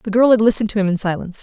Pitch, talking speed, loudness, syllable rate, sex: 210 Hz, 335 wpm, -16 LUFS, 8.6 syllables/s, female